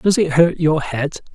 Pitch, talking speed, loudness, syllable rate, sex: 160 Hz, 225 wpm, -17 LUFS, 4.2 syllables/s, male